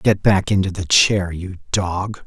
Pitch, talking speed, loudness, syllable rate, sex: 95 Hz, 185 wpm, -18 LUFS, 3.9 syllables/s, male